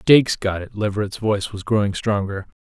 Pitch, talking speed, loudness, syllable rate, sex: 105 Hz, 185 wpm, -21 LUFS, 6.0 syllables/s, male